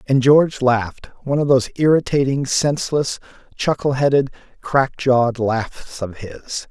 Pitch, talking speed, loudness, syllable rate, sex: 130 Hz, 125 wpm, -18 LUFS, 4.8 syllables/s, male